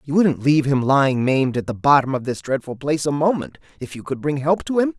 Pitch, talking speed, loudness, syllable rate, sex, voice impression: 140 Hz, 265 wpm, -19 LUFS, 6.2 syllables/s, male, masculine, slightly young, adult-like, slightly thick, slightly tensed, slightly powerful, bright, hard, clear, fluent, slightly cool, slightly intellectual, slightly sincere, slightly calm, friendly, slightly reassuring, wild, lively, slightly kind